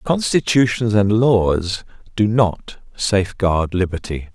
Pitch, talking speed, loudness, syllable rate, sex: 105 Hz, 95 wpm, -18 LUFS, 3.7 syllables/s, male